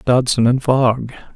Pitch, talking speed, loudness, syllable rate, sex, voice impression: 125 Hz, 135 wpm, -16 LUFS, 3.8 syllables/s, male, masculine, slightly old, slightly thick, slightly muffled, sincere, calm, slightly elegant